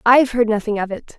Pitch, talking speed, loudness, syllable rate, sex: 225 Hz, 250 wpm, -18 LUFS, 6.4 syllables/s, female